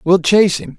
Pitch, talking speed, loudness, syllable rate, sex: 175 Hz, 230 wpm, -13 LUFS, 5.8 syllables/s, male